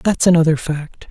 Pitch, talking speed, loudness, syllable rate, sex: 165 Hz, 165 wpm, -16 LUFS, 5.1 syllables/s, male